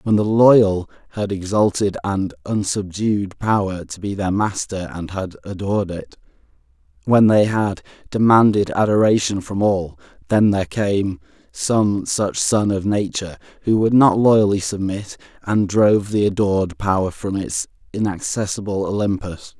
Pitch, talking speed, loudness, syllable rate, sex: 100 Hz, 140 wpm, -19 LUFS, 4.5 syllables/s, male